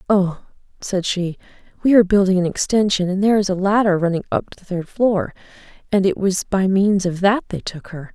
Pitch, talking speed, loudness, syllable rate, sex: 190 Hz, 215 wpm, -18 LUFS, 5.6 syllables/s, female